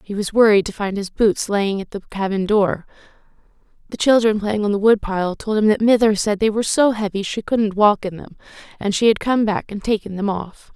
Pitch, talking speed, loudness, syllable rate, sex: 205 Hz, 230 wpm, -18 LUFS, 5.6 syllables/s, female